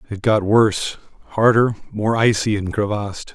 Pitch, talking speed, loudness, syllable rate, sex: 105 Hz, 145 wpm, -18 LUFS, 4.9 syllables/s, male